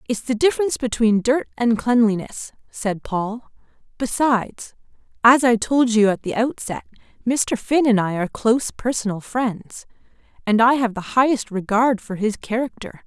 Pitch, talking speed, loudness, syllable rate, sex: 230 Hz, 155 wpm, -20 LUFS, 4.8 syllables/s, female